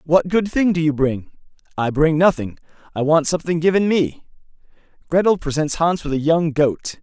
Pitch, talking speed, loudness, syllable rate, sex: 160 Hz, 180 wpm, -18 LUFS, 5.0 syllables/s, male